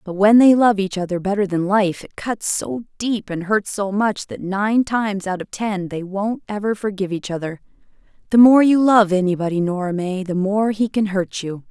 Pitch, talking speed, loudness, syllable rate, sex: 200 Hz, 215 wpm, -19 LUFS, 5.0 syllables/s, female